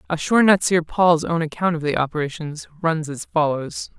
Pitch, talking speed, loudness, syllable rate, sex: 160 Hz, 165 wpm, -20 LUFS, 5.1 syllables/s, female